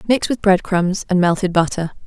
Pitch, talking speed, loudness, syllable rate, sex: 185 Hz, 205 wpm, -17 LUFS, 5.0 syllables/s, female